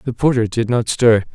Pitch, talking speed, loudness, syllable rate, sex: 115 Hz, 225 wpm, -16 LUFS, 4.9 syllables/s, male